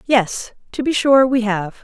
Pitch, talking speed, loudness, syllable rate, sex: 235 Hz, 195 wpm, -17 LUFS, 3.9 syllables/s, female